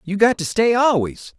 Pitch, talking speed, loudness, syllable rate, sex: 195 Hz, 215 wpm, -18 LUFS, 4.8 syllables/s, male